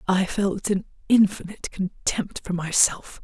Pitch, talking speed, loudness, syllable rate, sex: 190 Hz, 130 wpm, -23 LUFS, 4.3 syllables/s, female